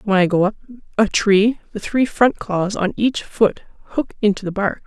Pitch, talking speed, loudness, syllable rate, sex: 210 Hz, 210 wpm, -19 LUFS, 4.8 syllables/s, female